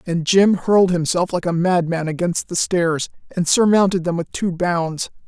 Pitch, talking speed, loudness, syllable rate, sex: 175 Hz, 180 wpm, -18 LUFS, 4.6 syllables/s, female